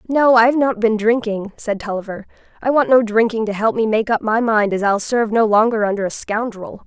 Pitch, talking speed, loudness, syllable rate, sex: 220 Hz, 225 wpm, -17 LUFS, 5.6 syllables/s, female